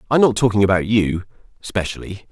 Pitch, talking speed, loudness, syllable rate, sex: 105 Hz, 130 wpm, -18 LUFS, 5.9 syllables/s, male